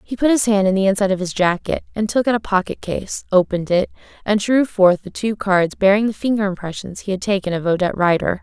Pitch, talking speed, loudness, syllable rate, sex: 200 Hz, 240 wpm, -18 LUFS, 6.2 syllables/s, female